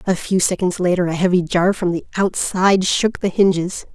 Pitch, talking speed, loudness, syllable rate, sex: 180 Hz, 200 wpm, -18 LUFS, 5.3 syllables/s, female